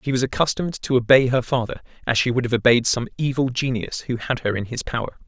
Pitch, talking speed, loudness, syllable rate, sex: 125 Hz, 240 wpm, -21 LUFS, 6.4 syllables/s, male